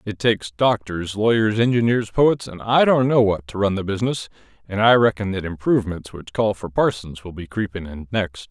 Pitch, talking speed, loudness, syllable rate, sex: 105 Hz, 205 wpm, -20 LUFS, 5.3 syllables/s, male